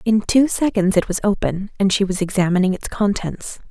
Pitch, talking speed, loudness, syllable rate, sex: 200 Hz, 195 wpm, -19 LUFS, 5.3 syllables/s, female